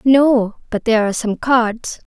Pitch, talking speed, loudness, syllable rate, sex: 235 Hz, 170 wpm, -16 LUFS, 4.5 syllables/s, female